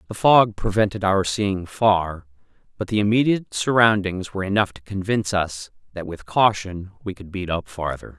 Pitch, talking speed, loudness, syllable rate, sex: 100 Hz, 170 wpm, -21 LUFS, 5.0 syllables/s, male